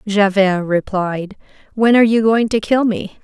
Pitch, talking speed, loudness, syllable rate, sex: 205 Hz, 165 wpm, -15 LUFS, 4.4 syllables/s, female